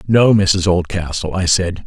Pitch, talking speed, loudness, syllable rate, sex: 90 Hz, 160 wpm, -15 LUFS, 4.1 syllables/s, male